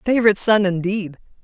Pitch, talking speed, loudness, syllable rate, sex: 200 Hz, 125 wpm, -18 LUFS, 6.3 syllables/s, female